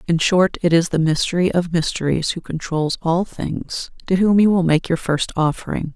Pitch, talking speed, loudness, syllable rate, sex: 170 Hz, 200 wpm, -19 LUFS, 4.9 syllables/s, female